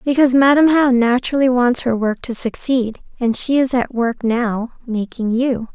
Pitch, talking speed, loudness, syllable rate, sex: 245 Hz, 180 wpm, -17 LUFS, 4.7 syllables/s, female